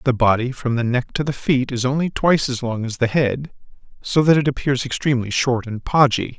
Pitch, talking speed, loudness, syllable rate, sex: 130 Hz, 225 wpm, -19 LUFS, 5.6 syllables/s, male